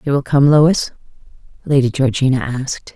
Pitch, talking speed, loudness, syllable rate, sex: 135 Hz, 140 wpm, -15 LUFS, 5.1 syllables/s, female